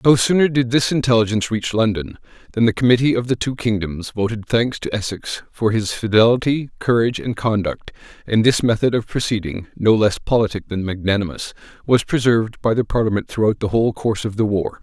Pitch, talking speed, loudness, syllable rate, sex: 110 Hz, 185 wpm, -19 LUFS, 5.9 syllables/s, male